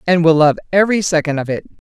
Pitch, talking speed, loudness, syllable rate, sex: 165 Hz, 220 wpm, -15 LUFS, 7.1 syllables/s, female